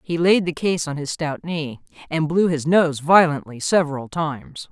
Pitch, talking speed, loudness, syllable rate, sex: 160 Hz, 190 wpm, -20 LUFS, 4.6 syllables/s, female